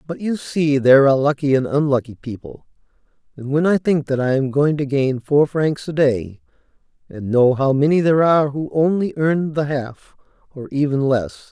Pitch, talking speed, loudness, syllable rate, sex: 145 Hz, 195 wpm, -18 LUFS, 5.1 syllables/s, male